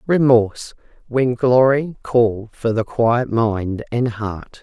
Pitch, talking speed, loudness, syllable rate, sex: 120 Hz, 130 wpm, -18 LUFS, 3.5 syllables/s, female